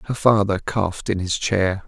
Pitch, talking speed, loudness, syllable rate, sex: 100 Hz, 190 wpm, -21 LUFS, 5.0 syllables/s, male